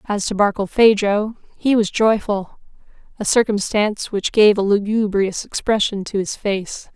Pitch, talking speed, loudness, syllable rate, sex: 210 Hz, 130 wpm, -18 LUFS, 4.5 syllables/s, female